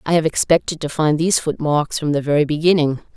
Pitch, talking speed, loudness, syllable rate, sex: 155 Hz, 210 wpm, -18 LUFS, 6.1 syllables/s, female